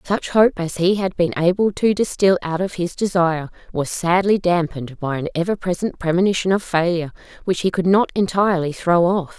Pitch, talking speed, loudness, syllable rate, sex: 180 Hz, 190 wpm, -19 LUFS, 5.5 syllables/s, female